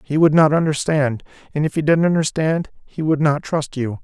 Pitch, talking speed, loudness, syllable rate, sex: 150 Hz, 210 wpm, -18 LUFS, 5.2 syllables/s, male